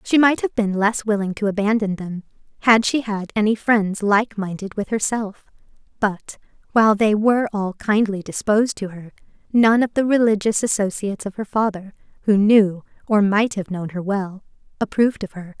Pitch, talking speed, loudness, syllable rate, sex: 210 Hz, 175 wpm, -20 LUFS, 5.1 syllables/s, female